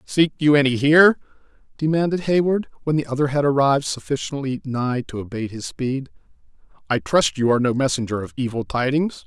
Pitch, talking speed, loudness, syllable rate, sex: 135 Hz, 170 wpm, -20 LUFS, 5.8 syllables/s, male